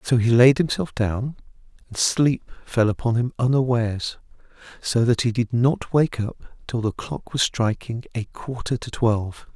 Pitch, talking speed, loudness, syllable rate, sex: 120 Hz, 170 wpm, -22 LUFS, 4.4 syllables/s, male